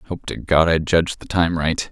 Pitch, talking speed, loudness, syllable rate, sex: 80 Hz, 250 wpm, -19 LUFS, 4.8 syllables/s, male